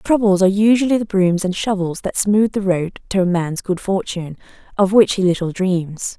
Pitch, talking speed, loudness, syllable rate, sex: 190 Hz, 205 wpm, -17 LUFS, 5.1 syllables/s, female